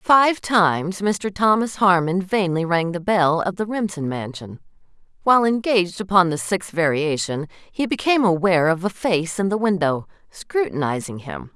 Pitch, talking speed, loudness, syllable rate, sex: 180 Hz, 155 wpm, -20 LUFS, 4.8 syllables/s, female